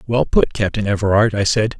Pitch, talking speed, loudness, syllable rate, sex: 105 Hz, 200 wpm, -17 LUFS, 5.5 syllables/s, male